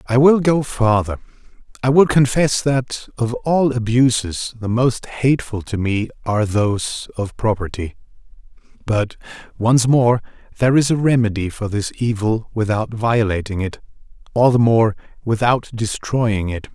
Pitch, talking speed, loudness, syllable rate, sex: 115 Hz, 140 wpm, -18 LUFS, 4.5 syllables/s, male